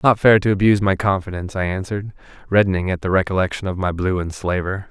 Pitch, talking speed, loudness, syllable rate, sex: 95 Hz, 210 wpm, -19 LUFS, 6.9 syllables/s, male